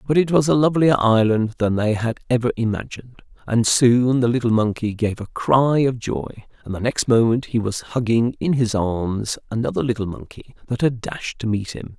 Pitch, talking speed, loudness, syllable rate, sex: 120 Hz, 200 wpm, -20 LUFS, 5.1 syllables/s, male